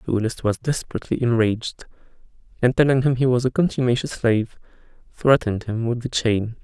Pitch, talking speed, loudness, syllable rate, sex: 120 Hz, 165 wpm, -21 LUFS, 6.2 syllables/s, male